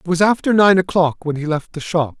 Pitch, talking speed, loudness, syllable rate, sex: 170 Hz, 275 wpm, -17 LUFS, 5.6 syllables/s, male